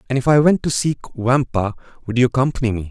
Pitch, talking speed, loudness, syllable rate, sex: 125 Hz, 225 wpm, -18 LUFS, 6.8 syllables/s, male